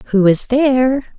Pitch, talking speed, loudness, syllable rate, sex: 245 Hz, 150 wpm, -14 LUFS, 4.0 syllables/s, female